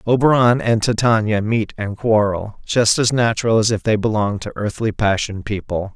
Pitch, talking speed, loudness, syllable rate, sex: 110 Hz, 170 wpm, -18 LUFS, 5.1 syllables/s, male